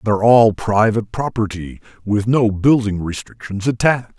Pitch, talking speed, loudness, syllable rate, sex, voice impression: 110 Hz, 130 wpm, -17 LUFS, 5.0 syllables/s, male, masculine, middle-aged, relaxed, powerful, slightly hard, muffled, raspy, cool, intellectual, calm, mature, wild, lively, strict, intense, sharp